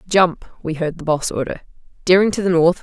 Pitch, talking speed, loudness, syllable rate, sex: 170 Hz, 210 wpm, -18 LUFS, 5.6 syllables/s, female